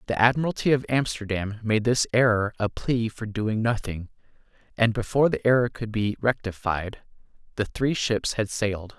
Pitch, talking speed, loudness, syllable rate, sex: 110 Hz, 160 wpm, -25 LUFS, 5.0 syllables/s, male